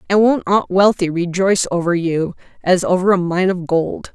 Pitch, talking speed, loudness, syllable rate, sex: 180 Hz, 190 wpm, -17 LUFS, 4.9 syllables/s, female